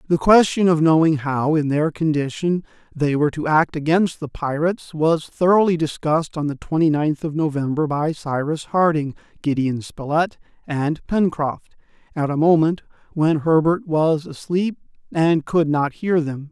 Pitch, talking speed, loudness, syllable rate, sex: 155 Hz, 155 wpm, -20 LUFS, 4.6 syllables/s, male